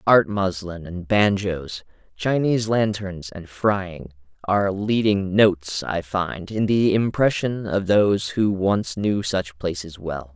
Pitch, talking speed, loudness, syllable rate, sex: 95 Hz, 140 wpm, -22 LUFS, 3.8 syllables/s, male